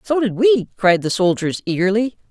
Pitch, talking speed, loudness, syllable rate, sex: 210 Hz, 180 wpm, -17 LUFS, 5.1 syllables/s, female